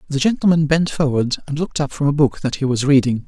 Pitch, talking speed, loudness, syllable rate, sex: 145 Hz, 255 wpm, -18 LUFS, 6.4 syllables/s, male